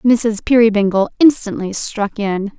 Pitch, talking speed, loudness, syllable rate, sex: 215 Hz, 115 wpm, -15 LUFS, 4.2 syllables/s, female